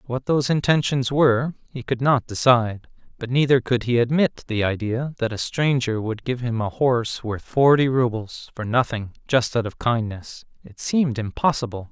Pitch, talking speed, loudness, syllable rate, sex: 125 Hz, 175 wpm, -22 LUFS, 4.9 syllables/s, male